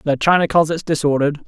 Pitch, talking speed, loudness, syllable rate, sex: 155 Hz, 165 wpm, -17 LUFS, 6.9 syllables/s, male